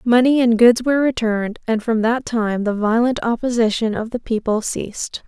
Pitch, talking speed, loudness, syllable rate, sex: 230 Hz, 180 wpm, -18 LUFS, 5.2 syllables/s, female